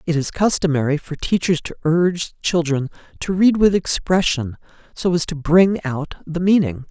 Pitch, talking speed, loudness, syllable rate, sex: 165 Hz, 165 wpm, -19 LUFS, 4.8 syllables/s, male